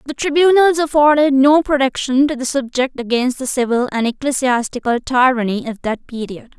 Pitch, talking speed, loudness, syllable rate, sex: 265 Hz, 155 wpm, -16 LUFS, 5.2 syllables/s, female